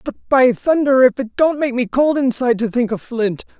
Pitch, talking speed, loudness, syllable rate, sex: 250 Hz, 235 wpm, -16 LUFS, 5.3 syllables/s, female